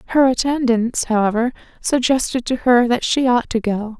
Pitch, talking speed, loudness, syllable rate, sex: 240 Hz, 165 wpm, -18 LUFS, 5.0 syllables/s, female